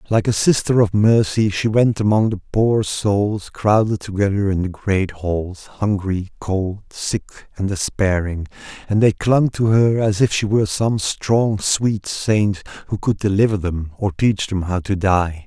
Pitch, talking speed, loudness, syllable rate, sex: 100 Hz, 175 wpm, -19 LUFS, 4.1 syllables/s, male